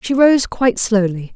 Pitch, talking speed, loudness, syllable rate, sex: 225 Hz, 175 wpm, -15 LUFS, 4.8 syllables/s, female